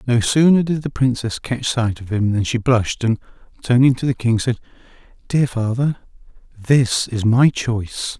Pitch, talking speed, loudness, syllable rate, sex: 120 Hz, 175 wpm, -18 LUFS, 4.8 syllables/s, male